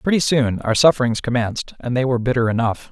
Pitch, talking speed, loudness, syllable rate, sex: 125 Hz, 205 wpm, -19 LUFS, 6.4 syllables/s, male